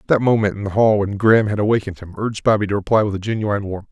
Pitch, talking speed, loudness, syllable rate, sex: 105 Hz, 275 wpm, -18 LUFS, 7.6 syllables/s, male